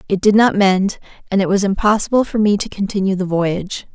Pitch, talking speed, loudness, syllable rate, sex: 195 Hz, 215 wpm, -16 LUFS, 5.9 syllables/s, female